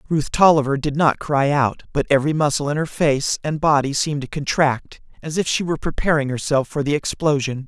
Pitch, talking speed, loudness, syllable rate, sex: 145 Hz, 205 wpm, -19 LUFS, 5.6 syllables/s, male